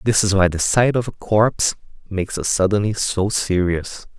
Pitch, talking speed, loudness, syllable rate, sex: 100 Hz, 185 wpm, -19 LUFS, 4.8 syllables/s, male